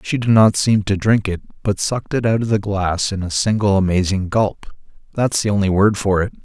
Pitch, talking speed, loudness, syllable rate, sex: 100 Hz, 225 wpm, -17 LUFS, 5.4 syllables/s, male